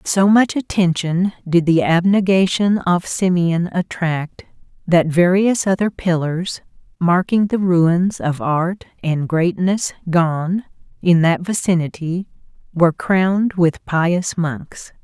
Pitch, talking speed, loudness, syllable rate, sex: 175 Hz, 115 wpm, -17 LUFS, 3.6 syllables/s, female